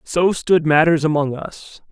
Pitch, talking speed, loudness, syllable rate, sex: 160 Hz, 155 wpm, -17 LUFS, 4.0 syllables/s, male